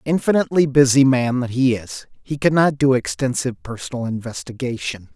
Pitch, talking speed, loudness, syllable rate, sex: 130 Hz, 140 wpm, -19 LUFS, 5.6 syllables/s, male